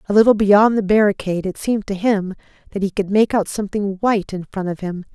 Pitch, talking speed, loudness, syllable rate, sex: 200 Hz, 235 wpm, -18 LUFS, 6.2 syllables/s, female